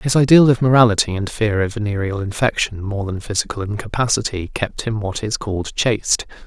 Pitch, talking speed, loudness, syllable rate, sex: 110 Hz, 175 wpm, -18 LUFS, 5.6 syllables/s, male